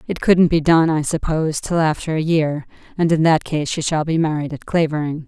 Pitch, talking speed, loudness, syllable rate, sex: 155 Hz, 230 wpm, -18 LUFS, 5.4 syllables/s, female